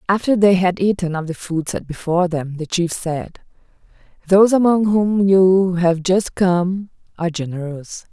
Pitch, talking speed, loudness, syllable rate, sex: 180 Hz, 165 wpm, -17 LUFS, 4.6 syllables/s, female